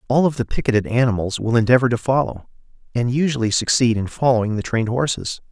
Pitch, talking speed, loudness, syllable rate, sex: 120 Hz, 185 wpm, -19 LUFS, 6.5 syllables/s, male